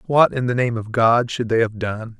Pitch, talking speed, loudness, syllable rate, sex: 120 Hz, 275 wpm, -19 LUFS, 4.9 syllables/s, male